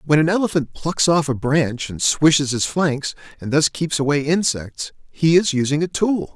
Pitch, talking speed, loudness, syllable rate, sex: 150 Hz, 200 wpm, -19 LUFS, 4.6 syllables/s, male